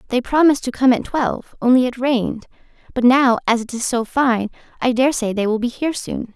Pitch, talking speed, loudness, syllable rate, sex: 245 Hz, 225 wpm, -18 LUFS, 5.8 syllables/s, female